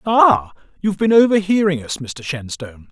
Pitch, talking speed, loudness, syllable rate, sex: 160 Hz, 145 wpm, -17 LUFS, 5.2 syllables/s, male